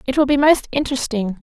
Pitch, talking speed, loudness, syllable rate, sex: 260 Hz, 205 wpm, -18 LUFS, 6.4 syllables/s, female